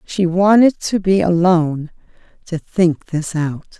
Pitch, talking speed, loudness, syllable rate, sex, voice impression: 175 Hz, 140 wpm, -16 LUFS, 3.8 syllables/s, female, feminine, gender-neutral, very middle-aged, slightly thin, very tensed, very powerful, bright, slightly hard, slightly soft, very clear, very fluent, slightly cool, intellectual, slightly refreshing, slightly sincere, calm, friendly, reassuring, very unique, slightly elegant, wild, slightly sweet, lively, strict, slightly intense, sharp, slightly light